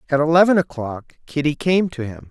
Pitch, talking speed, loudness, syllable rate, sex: 150 Hz, 180 wpm, -19 LUFS, 5.4 syllables/s, male